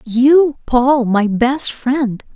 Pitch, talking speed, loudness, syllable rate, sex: 255 Hz, 125 wpm, -14 LUFS, 2.4 syllables/s, female